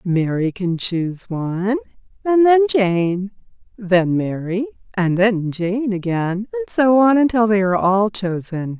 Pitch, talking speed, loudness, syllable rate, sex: 205 Hz, 145 wpm, -18 LUFS, 4.1 syllables/s, female